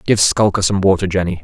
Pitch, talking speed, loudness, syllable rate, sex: 95 Hz, 210 wpm, -15 LUFS, 6.1 syllables/s, male